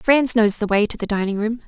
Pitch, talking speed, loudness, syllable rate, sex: 220 Hz, 285 wpm, -19 LUFS, 5.7 syllables/s, female